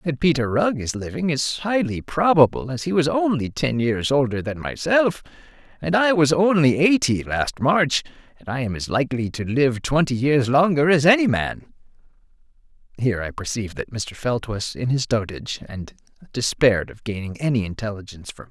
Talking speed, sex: 200 wpm, male